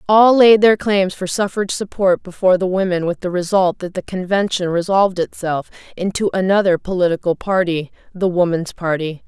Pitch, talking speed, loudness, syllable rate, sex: 185 Hz, 160 wpm, -17 LUFS, 5.4 syllables/s, female